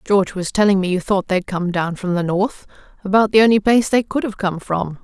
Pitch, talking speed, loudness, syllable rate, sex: 195 Hz, 250 wpm, -18 LUFS, 5.7 syllables/s, female